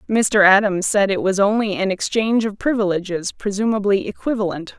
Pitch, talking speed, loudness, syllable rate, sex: 205 Hz, 150 wpm, -18 LUFS, 5.5 syllables/s, female